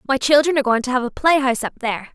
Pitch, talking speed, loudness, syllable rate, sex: 260 Hz, 310 wpm, -18 LUFS, 7.8 syllables/s, female